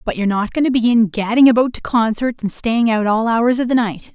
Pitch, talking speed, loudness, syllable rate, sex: 230 Hz, 260 wpm, -16 LUFS, 5.7 syllables/s, female